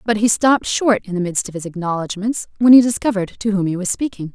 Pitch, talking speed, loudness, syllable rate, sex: 205 Hz, 250 wpm, -17 LUFS, 6.4 syllables/s, female